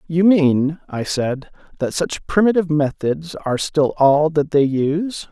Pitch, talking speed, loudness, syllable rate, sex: 155 Hz, 160 wpm, -18 LUFS, 4.2 syllables/s, male